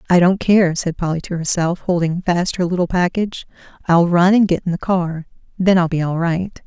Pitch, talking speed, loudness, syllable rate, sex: 175 Hz, 205 wpm, -17 LUFS, 5.3 syllables/s, female